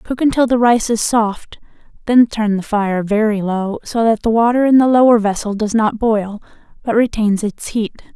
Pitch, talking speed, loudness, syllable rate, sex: 220 Hz, 200 wpm, -15 LUFS, 4.7 syllables/s, female